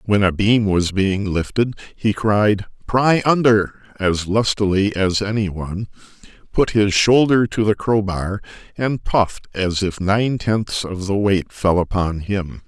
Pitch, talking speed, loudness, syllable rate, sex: 100 Hz, 155 wpm, -19 LUFS, 4.0 syllables/s, male